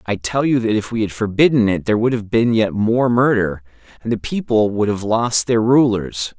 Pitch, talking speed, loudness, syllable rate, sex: 110 Hz, 225 wpm, -17 LUFS, 5.1 syllables/s, male